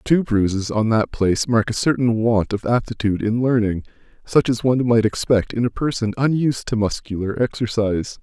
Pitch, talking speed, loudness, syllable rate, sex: 115 Hz, 180 wpm, -20 LUFS, 5.5 syllables/s, male